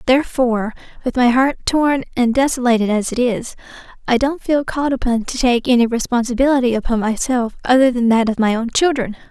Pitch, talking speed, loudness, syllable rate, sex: 245 Hz, 180 wpm, -17 LUFS, 5.8 syllables/s, female